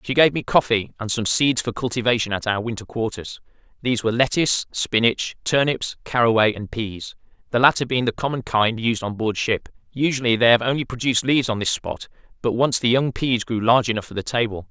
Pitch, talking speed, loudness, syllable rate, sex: 120 Hz, 210 wpm, -21 LUFS, 5.8 syllables/s, male